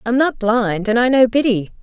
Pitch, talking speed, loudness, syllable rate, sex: 235 Hz, 230 wpm, -16 LUFS, 4.9 syllables/s, female